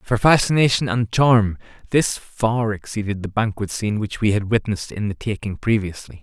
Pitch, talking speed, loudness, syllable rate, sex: 110 Hz, 175 wpm, -20 LUFS, 5.2 syllables/s, male